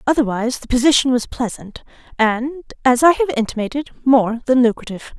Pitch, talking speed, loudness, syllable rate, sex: 250 Hz, 150 wpm, -17 LUFS, 6.0 syllables/s, female